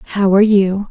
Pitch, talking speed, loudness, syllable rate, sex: 200 Hz, 200 wpm, -13 LUFS, 6.9 syllables/s, female